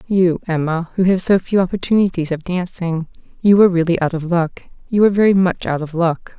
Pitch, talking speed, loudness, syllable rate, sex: 175 Hz, 205 wpm, -17 LUFS, 5.7 syllables/s, female